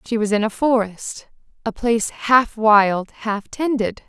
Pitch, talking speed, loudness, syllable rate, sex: 225 Hz, 160 wpm, -19 LUFS, 3.9 syllables/s, female